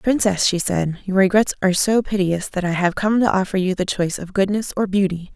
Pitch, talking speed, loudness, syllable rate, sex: 190 Hz, 235 wpm, -19 LUFS, 5.6 syllables/s, female